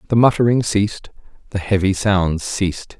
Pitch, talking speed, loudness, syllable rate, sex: 100 Hz, 140 wpm, -18 LUFS, 5.1 syllables/s, male